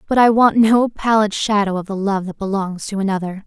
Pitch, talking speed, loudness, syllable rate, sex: 205 Hz, 225 wpm, -17 LUFS, 5.4 syllables/s, female